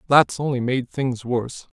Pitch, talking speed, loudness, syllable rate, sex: 125 Hz, 165 wpm, -22 LUFS, 4.6 syllables/s, male